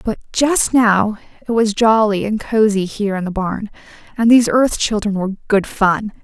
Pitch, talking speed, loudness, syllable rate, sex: 215 Hz, 185 wpm, -16 LUFS, 4.8 syllables/s, female